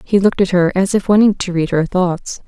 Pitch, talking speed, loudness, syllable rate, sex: 185 Hz, 265 wpm, -15 LUFS, 5.5 syllables/s, female